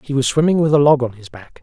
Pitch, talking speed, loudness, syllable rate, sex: 135 Hz, 330 wpm, -15 LUFS, 6.5 syllables/s, male